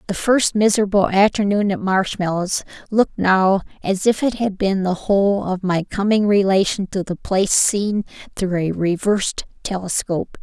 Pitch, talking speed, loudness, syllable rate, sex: 195 Hz, 155 wpm, -19 LUFS, 4.9 syllables/s, female